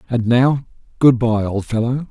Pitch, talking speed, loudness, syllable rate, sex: 120 Hz, 170 wpm, -17 LUFS, 4.4 syllables/s, male